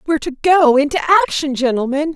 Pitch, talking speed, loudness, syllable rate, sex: 290 Hz, 165 wpm, -15 LUFS, 5.7 syllables/s, female